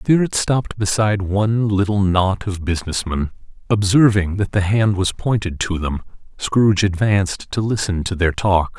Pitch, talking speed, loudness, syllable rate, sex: 100 Hz, 170 wpm, -18 LUFS, 5.1 syllables/s, male